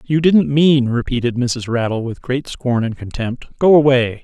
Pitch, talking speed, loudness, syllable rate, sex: 130 Hz, 185 wpm, -16 LUFS, 4.4 syllables/s, male